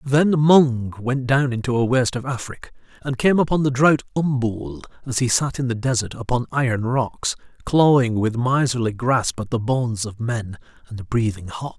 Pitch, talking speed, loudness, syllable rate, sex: 125 Hz, 185 wpm, -20 LUFS, 4.8 syllables/s, male